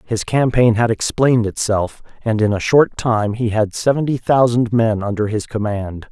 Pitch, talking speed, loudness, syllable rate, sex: 115 Hz, 175 wpm, -17 LUFS, 4.7 syllables/s, male